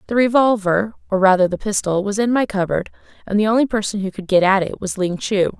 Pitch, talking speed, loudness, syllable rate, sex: 205 Hz, 235 wpm, -18 LUFS, 5.9 syllables/s, female